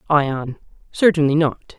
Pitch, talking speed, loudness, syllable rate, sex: 150 Hz, 100 wpm, -18 LUFS, 3.9 syllables/s, male